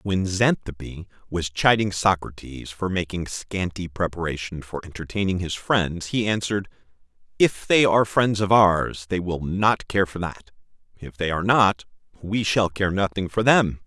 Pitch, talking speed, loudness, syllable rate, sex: 95 Hz, 155 wpm, -22 LUFS, 4.7 syllables/s, male